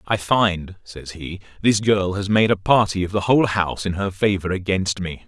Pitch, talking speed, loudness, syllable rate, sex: 95 Hz, 215 wpm, -20 LUFS, 5.0 syllables/s, male